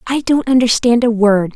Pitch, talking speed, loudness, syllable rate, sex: 235 Hz, 195 wpm, -13 LUFS, 5.0 syllables/s, female